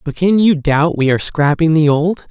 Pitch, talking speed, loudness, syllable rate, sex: 160 Hz, 235 wpm, -13 LUFS, 5.0 syllables/s, male